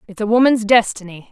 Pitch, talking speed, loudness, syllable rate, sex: 215 Hz, 185 wpm, -15 LUFS, 6.1 syllables/s, female